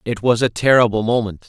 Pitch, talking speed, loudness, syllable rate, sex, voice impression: 115 Hz, 205 wpm, -16 LUFS, 5.9 syllables/s, male, very masculine, adult-like, thick, tensed, powerful, slightly bright, slightly soft, clear, fluent, slightly raspy, cool, intellectual, refreshing, sincere, slightly calm, very mature, friendly, slightly reassuring, unique, elegant, wild, very sweet, slightly lively, strict, slightly intense